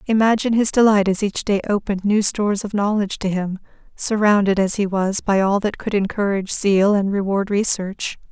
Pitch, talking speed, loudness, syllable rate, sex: 200 Hz, 190 wpm, -19 LUFS, 5.5 syllables/s, female